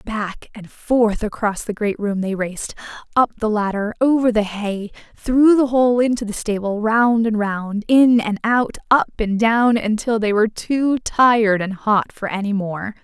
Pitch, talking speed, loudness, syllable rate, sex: 220 Hz, 180 wpm, -18 LUFS, 4.3 syllables/s, female